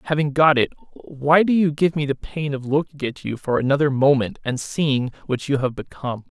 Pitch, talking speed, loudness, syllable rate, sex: 140 Hz, 215 wpm, -21 LUFS, 5.2 syllables/s, male